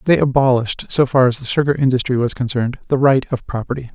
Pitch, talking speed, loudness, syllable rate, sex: 130 Hz, 215 wpm, -17 LUFS, 6.5 syllables/s, male